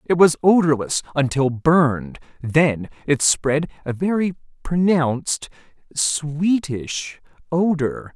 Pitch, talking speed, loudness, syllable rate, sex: 150 Hz, 95 wpm, -20 LUFS, 3.5 syllables/s, male